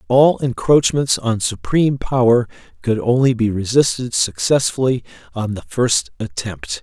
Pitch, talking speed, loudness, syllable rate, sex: 120 Hz, 125 wpm, -17 LUFS, 4.4 syllables/s, male